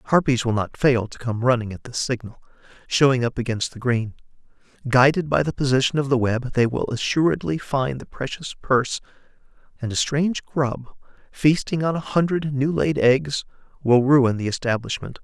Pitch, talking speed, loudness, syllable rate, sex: 130 Hz, 175 wpm, -22 LUFS, 5.1 syllables/s, male